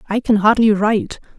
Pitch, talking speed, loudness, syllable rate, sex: 215 Hz, 175 wpm, -15 LUFS, 5.8 syllables/s, female